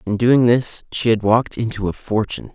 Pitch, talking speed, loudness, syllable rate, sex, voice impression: 110 Hz, 210 wpm, -18 LUFS, 5.5 syllables/s, male, masculine, adult-like, slightly refreshing, slightly sincere, kind